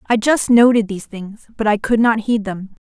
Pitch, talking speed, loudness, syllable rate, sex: 220 Hz, 230 wpm, -16 LUFS, 5.1 syllables/s, female